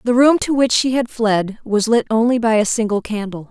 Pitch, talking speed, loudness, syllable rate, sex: 225 Hz, 240 wpm, -17 LUFS, 5.2 syllables/s, female